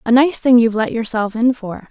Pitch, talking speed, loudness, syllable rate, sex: 235 Hz, 250 wpm, -16 LUFS, 6.1 syllables/s, female